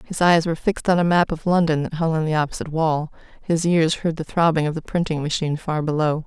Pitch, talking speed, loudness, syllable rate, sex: 160 Hz, 250 wpm, -21 LUFS, 6.3 syllables/s, female